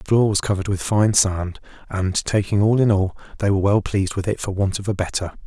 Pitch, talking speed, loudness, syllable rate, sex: 100 Hz, 255 wpm, -20 LUFS, 6.0 syllables/s, male